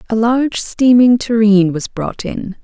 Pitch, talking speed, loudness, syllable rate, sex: 225 Hz, 160 wpm, -14 LUFS, 4.2 syllables/s, female